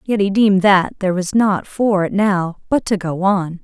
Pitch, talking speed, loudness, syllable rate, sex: 195 Hz, 230 wpm, -16 LUFS, 4.7 syllables/s, female